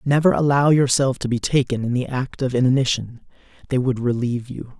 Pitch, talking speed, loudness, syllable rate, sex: 130 Hz, 190 wpm, -20 LUFS, 5.7 syllables/s, male